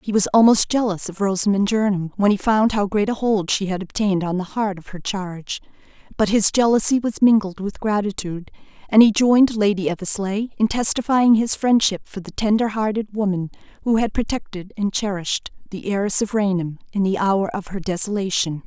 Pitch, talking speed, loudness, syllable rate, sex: 205 Hz, 190 wpm, -20 LUFS, 5.5 syllables/s, female